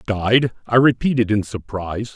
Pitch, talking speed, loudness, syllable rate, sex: 110 Hz, 140 wpm, -19 LUFS, 4.8 syllables/s, male